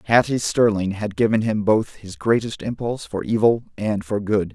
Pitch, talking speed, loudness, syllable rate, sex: 110 Hz, 185 wpm, -21 LUFS, 4.9 syllables/s, male